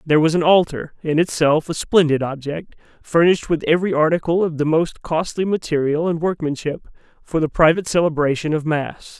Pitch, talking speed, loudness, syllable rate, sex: 160 Hz, 170 wpm, -19 LUFS, 5.6 syllables/s, male